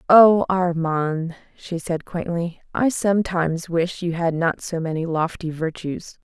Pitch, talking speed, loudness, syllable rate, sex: 170 Hz, 145 wpm, -22 LUFS, 4.1 syllables/s, female